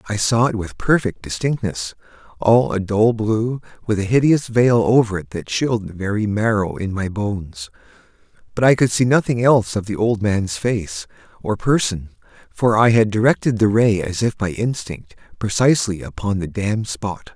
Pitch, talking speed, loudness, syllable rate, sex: 105 Hz, 175 wpm, -19 LUFS, 4.9 syllables/s, male